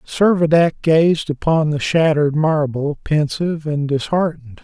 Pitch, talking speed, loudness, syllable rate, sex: 155 Hz, 115 wpm, -17 LUFS, 4.7 syllables/s, male